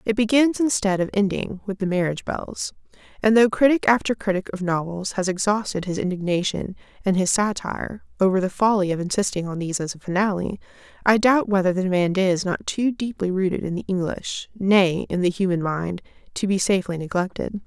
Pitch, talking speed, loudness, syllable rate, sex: 195 Hz, 185 wpm, -22 LUFS, 5.6 syllables/s, female